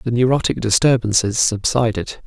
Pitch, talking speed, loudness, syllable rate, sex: 115 Hz, 105 wpm, -17 LUFS, 5.1 syllables/s, male